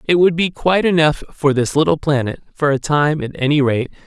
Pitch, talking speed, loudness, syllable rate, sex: 150 Hz, 220 wpm, -17 LUFS, 5.7 syllables/s, male